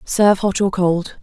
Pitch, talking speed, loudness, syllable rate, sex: 190 Hz, 195 wpm, -17 LUFS, 4.4 syllables/s, female